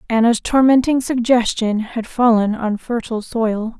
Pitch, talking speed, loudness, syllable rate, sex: 230 Hz, 125 wpm, -17 LUFS, 4.4 syllables/s, female